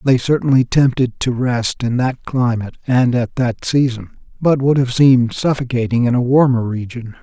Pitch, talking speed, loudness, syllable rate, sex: 125 Hz, 175 wpm, -16 LUFS, 4.9 syllables/s, male